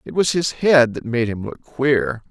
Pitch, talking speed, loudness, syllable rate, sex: 130 Hz, 235 wpm, -19 LUFS, 4.2 syllables/s, male